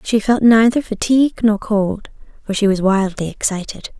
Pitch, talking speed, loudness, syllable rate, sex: 210 Hz, 165 wpm, -16 LUFS, 5.0 syllables/s, female